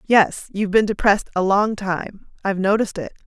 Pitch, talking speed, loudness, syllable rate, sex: 200 Hz, 180 wpm, -20 LUFS, 5.7 syllables/s, female